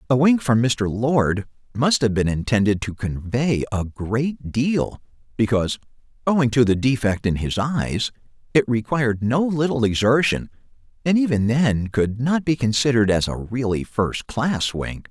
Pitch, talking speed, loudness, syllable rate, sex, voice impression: 120 Hz, 155 wpm, -21 LUFS, 4.5 syllables/s, male, very masculine, very adult-like, middle-aged, very thick, tensed, powerful, slightly bright, very soft, muffled, fluent, cool, very intellectual, slightly refreshing, sincere, very calm, very mature, friendly, very reassuring, very unique, slightly elegant, wild, sweet, very lively, very kind, slightly intense